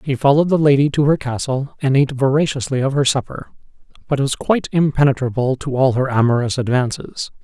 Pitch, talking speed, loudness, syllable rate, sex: 135 Hz, 180 wpm, -17 LUFS, 6.1 syllables/s, male